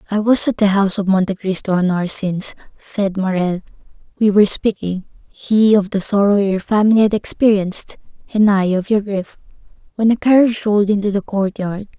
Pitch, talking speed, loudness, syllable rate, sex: 200 Hz, 185 wpm, -16 LUFS, 5.5 syllables/s, female